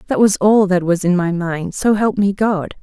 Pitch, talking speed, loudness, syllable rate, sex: 190 Hz, 255 wpm, -16 LUFS, 4.6 syllables/s, female